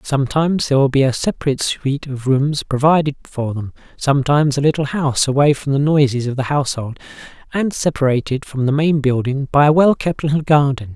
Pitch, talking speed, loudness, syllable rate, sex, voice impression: 140 Hz, 190 wpm, -17 LUFS, 6.0 syllables/s, male, very masculine, adult-like, slightly middle-aged, slightly thick, slightly relaxed, weak, slightly dark, slightly soft, slightly muffled, fluent, slightly cool, very intellectual, refreshing, very sincere, very calm, slightly mature, very friendly, very reassuring, unique, very elegant, sweet, very kind, modest